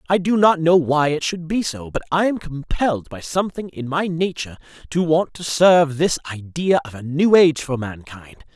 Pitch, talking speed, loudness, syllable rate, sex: 160 Hz, 210 wpm, -19 LUFS, 5.3 syllables/s, male